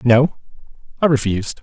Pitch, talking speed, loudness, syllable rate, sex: 125 Hz, 110 wpm, -18 LUFS, 5.6 syllables/s, male